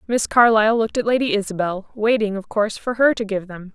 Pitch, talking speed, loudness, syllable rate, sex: 215 Hz, 225 wpm, -19 LUFS, 6.2 syllables/s, female